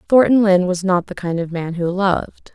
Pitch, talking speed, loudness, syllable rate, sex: 185 Hz, 235 wpm, -17 LUFS, 5.5 syllables/s, female